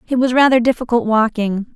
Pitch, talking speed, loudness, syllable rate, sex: 235 Hz, 170 wpm, -15 LUFS, 5.9 syllables/s, female